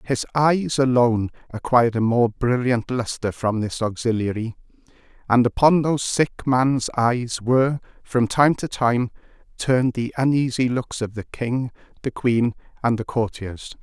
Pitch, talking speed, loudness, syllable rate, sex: 120 Hz, 150 wpm, -21 LUFS, 4.4 syllables/s, male